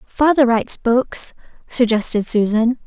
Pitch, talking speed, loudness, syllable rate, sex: 240 Hz, 105 wpm, -17 LUFS, 4.3 syllables/s, female